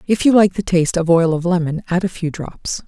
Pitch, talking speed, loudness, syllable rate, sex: 175 Hz, 270 wpm, -17 LUFS, 5.7 syllables/s, female